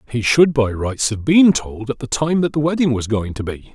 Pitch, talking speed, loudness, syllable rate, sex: 130 Hz, 270 wpm, -17 LUFS, 5.1 syllables/s, male